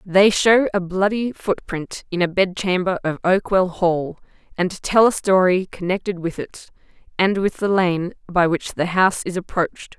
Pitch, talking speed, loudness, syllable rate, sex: 185 Hz, 175 wpm, -19 LUFS, 4.5 syllables/s, female